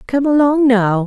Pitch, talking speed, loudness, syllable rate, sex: 250 Hz, 170 wpm, -13 LUFS, 4.3 syllables/s, female